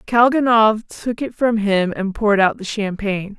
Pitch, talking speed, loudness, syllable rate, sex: 215 Hz, 175 wpm, -18 LUFS, 4.6 syllables/s, female